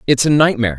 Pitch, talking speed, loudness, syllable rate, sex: 130 Hz, 230 wpm, -13 LUFS, 7.9 syllables/s, male